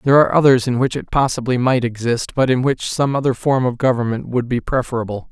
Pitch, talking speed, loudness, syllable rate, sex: 125 Hz, 225 wpm, -17 LUFS, 6.2 syllables/s, male